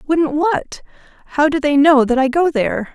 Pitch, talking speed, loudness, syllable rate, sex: 285 Hz, 185 wpm, -15 LUFS, 4.9 syllables/s, female